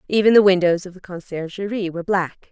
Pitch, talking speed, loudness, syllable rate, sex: 185 Hz, 190 wpm, -19 LUFS, 6.3 syllables/s, female